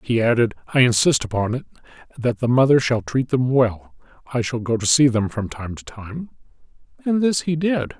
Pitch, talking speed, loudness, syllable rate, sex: 125 Hz, 205 wpm, -20 LUFS, 5.1 syllables/s, male